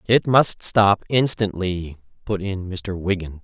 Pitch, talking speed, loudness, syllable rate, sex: 100 Hz, 140 wpm, -20 LUFS, 3.7 syllables/s, male